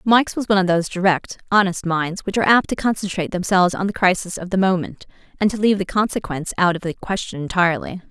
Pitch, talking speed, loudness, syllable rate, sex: 185 Hz, 220 wpm, -19 LUFS, 6.9 syllables/s, female